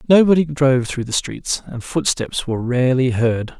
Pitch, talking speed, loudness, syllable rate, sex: 135 Hz, 165 wpm, -18 LUFS, 5.0 syllables/s, male